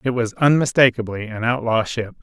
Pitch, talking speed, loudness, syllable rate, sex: 120 Hz, 160 wpm, -19 LUFS, 5.3 syllables/s, male